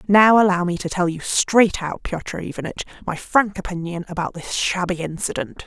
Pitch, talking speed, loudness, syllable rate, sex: 180 Hz, 180 wpm, -21 LUFS, 5.1 syllables/s, female